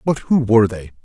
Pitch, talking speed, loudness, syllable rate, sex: 115 Hz, 230 wpm, -16 LUFS, 5.9 syllables/s, male